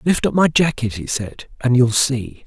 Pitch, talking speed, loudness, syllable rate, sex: 130 Hz, 220 wpm, -18 LUFS, 4.4 syllables/s, male